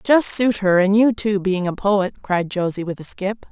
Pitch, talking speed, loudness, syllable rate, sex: 200 Hz, 240 wpm, -18 LUFS, 4.4 syllables/s, female